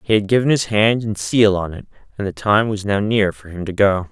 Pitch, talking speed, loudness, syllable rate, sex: 105 Hz, 275 wpm, -18 LUFS, 5.4 syllables/s, male